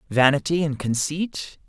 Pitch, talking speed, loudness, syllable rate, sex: 150 Hz, 105 wpm, -22 LUFS, 4.2 syllables/s, male